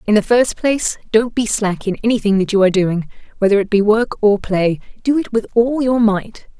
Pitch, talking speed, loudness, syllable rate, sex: 215 Hz, 230 wpm, -16 LUFS, 5.4 syllables/s, female